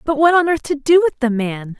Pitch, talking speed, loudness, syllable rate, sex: 285 Hz, 300 wpm, -16 LUFS, 5.8 syllables/s, female